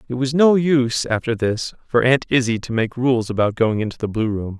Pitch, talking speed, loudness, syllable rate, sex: 120 Hz, 235 wpm, -19 LUFS, 5.4 syllables/s, male